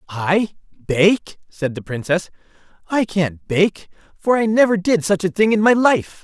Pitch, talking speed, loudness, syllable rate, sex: 190 Hz, 175 wpm, -18 LUFS, 4.2 syllables/s, male